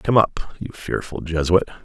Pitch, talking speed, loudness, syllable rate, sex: 90 Hz, 165 wpm, -22 LUFS, 4.6 syllables/s, male